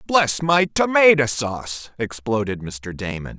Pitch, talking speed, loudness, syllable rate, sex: 130 Hz, 125 wpm, -20 LUFS, 4.2 syllables/s, male